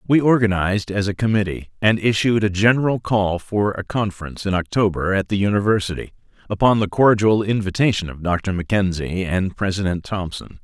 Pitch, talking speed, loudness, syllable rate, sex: 100 Hz, 160 wpm, -19 LUFS, 5.6 syllables/s, male